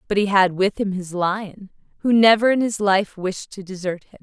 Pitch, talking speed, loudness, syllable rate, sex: 200 Hz, 225 wpm, -20 LUFS, 4.8 syllables/s, female